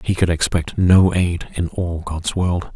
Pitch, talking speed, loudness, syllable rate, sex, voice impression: 85 Hz, 195 wpm, -19 LUFS, 3.9 syllables/s, male, masculine, adult-like, tensed, slightly powerful, dark, slightly muffled, cool, sincere, wild, slightly lively, slightly kind, modest